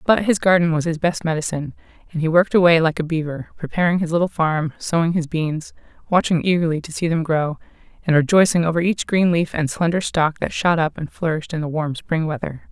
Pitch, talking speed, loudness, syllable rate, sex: 165 Hz, 215 wpm, -19 LUFS, 5.9 syllables/s, female